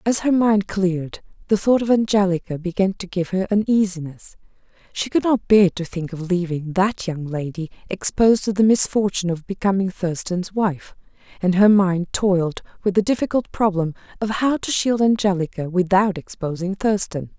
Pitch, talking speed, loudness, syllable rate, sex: 190 Hz, 160 wpm, -20 LUFS, 5.0 syllables/s, female